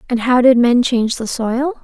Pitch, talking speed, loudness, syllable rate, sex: 245 Hz, 230 wpm, -14 LUFS, 5.0 syllables/s, female